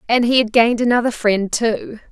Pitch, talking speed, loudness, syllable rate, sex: 230 Hz, 200 wpm, -16 LUFS, 5.4 syllables/s, female